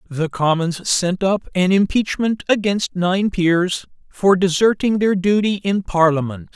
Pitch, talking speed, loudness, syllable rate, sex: 185 Hz, 135 wpm, -18 LUFS, 4.0 syllables/s, male